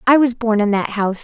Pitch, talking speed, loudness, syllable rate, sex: 225 Hz, 290 wpm, -17 LUFS, 6.4 syllables/s, female